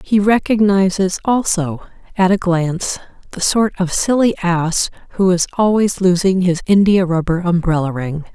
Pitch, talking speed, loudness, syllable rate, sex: 185 Hz, 135 wpm, -16 LUFS, 4.5 syllables/s, female